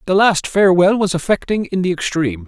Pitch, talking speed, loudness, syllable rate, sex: 180 Hz, 195 wpm, -16 LUFS, 6.1 syllables/s, male